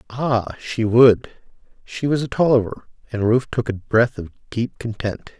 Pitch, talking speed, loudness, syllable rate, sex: 115 Hz, 155 wpm, -20 LUFS, 4.6 syllables/s, male